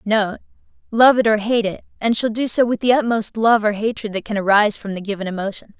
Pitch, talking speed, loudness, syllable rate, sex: 215 Hz, 240 wpm, -18 LUFS, 6.3 syllables/s, female